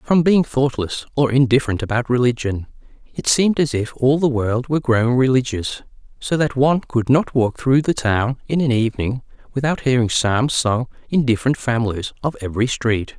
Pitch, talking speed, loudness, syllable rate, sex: 125 Hz, 175 wpm, -19 LUFS, 5.4 syllables/s, male